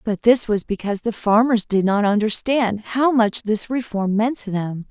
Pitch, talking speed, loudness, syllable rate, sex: 220 Hz, 195 wpm, -20 LUFS, 4.6 syllables/s, female